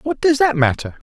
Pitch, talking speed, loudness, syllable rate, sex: 195 Hz, 215 wpm, -16 LUFS, 5.4 syllables/s, male